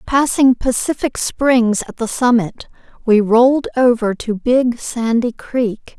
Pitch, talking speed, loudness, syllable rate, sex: 240 Hz, 130 wpm, -16 LUFS, 3.7 syllables/s, female